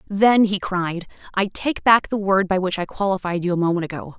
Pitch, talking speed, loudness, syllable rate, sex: 190 Hz, 230 wpm, -20 LUFS, 5.4 syllables/s, female